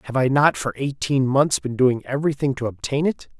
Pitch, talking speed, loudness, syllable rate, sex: 135 Hz, 210 wpm, -21 LUFS, 5.5 syllables/s, male